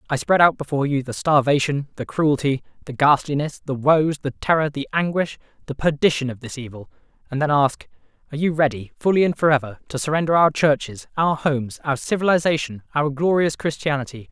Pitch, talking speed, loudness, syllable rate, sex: 145 Hz, 175 wpm, -21 LUFS, 5.9 syllables/s, male